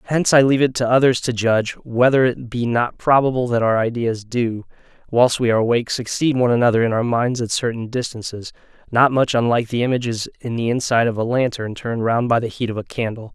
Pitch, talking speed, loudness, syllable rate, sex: 120 Hz, 220 wpm, -19 LUFS, 6.2 syllables/s, male